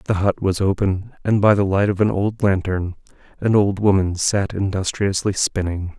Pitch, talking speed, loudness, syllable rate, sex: 100 Hz, 180 wpm, -19 LUFS, 4.6 syllables/s, male